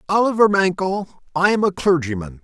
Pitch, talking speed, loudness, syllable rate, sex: 180 Hz, 150 wpm, -19 LUFS, 5.5 syllables/s, male